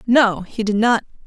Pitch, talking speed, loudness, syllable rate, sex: 220 Hz, 190 wpm, -18 LUFS, 4.4 syllables/s, female